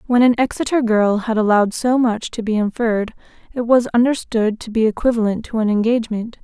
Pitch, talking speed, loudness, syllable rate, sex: 230 Hz, 185 wpm, -18 LUFS, 5.8 syllables/s, female